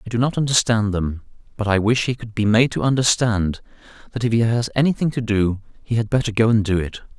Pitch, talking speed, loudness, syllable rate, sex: 110 Hz, 235 wpm, -20 LUFS, 6.0 syllables/s, male